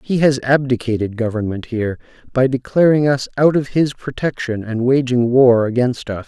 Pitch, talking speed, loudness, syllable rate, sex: 125 Hz, 165 wpm, -17 LUFS, 5.1 syllables/s, male